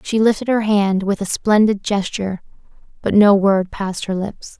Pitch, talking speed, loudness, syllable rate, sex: 200 Hz, 185 wpm, -17 LUFS, 4.9 syllables/s, female